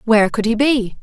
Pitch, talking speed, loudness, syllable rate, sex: 230 Hz, 235 wpm, -16 LUFS, 5.6 syllables/s, female